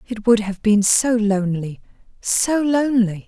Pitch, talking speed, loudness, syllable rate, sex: 220 Hz, 145 wpm, -18 LUFS, 4.4 syllables/s, female